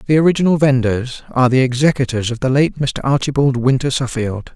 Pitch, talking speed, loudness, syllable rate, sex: 130 Hz, 170 wpm, -16 LUFS, 5.8 syllables/s, male